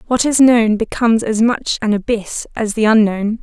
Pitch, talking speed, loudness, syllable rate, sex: 220 Hz, 195 wpm, -15 LUFS, 4.8 syllables/s, female